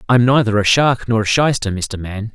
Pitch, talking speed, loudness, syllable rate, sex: 115 Hz, 230 wpm, -16 LUFS, 5.1 syllables/s, male